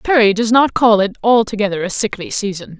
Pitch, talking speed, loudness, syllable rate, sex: 210 Hz, 195 wpm, -15 LUFS, 5.7 syllables/s, female